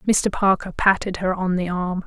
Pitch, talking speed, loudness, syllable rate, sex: 185 Hz, 205 wpm, -21 LUFS, 4.7 syllables/s, female